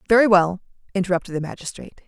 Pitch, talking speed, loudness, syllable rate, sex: 190 Hz, 145 wpm, -20 LUFS, 7.8 syllables/s, female